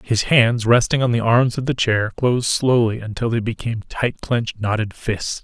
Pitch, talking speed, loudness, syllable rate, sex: 115 Hz, 200 wpm, -19 LUFS, 5.0 syllables/s, male